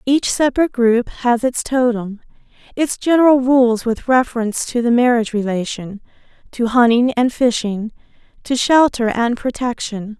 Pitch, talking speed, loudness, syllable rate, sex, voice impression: 240 Hz, 135 wpm, -16 LUFS, 4.8 syllables/s, female, feminine, slightly adult-like, soft, slightly cute, slightly calm, friendly, slightly reassuring, kind